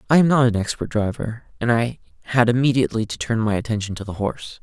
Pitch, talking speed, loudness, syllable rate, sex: 115 Hz, 220 wpm, -21 LUFS, 6.4 syllables/s, male